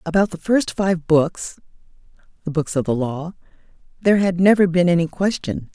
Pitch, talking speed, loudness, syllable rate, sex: 175 Hz, 145 wpm, -19 LUFS, 5.2 syllables/s, female